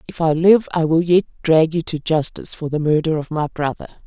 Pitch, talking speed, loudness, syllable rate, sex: 160 Hz, 235 wpm, -18 LUFS, 5.7 syllables/s, female